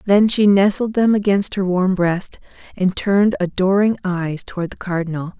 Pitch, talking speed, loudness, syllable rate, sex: 190 Hz, 165 wpm, -18 LUFS, 4.9 syllables/s, female